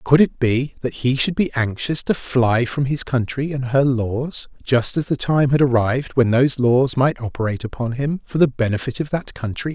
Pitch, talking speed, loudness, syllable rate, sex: 130 Hz, 215 wpm, -19 LUFS, 5.0 syllables/s, male